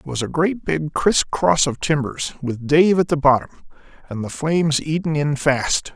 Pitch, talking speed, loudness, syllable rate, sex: 150 Hz, 200 wpm, -19 LUFS, 4.6 syllables/s, male